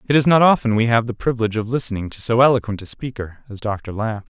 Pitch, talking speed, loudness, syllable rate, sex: 115 Hz, 250 wpm, -19 LUFS, 6.7 syllables/s, male